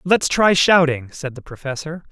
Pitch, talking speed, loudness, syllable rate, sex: 155 Hz, 170 wpm, -17 LUFS, 4.6 syllables/s, male